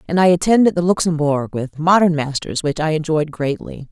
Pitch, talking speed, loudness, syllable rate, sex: 160 Hz, 185 wpm, -17 LUFS, 5.3 syllables/s, female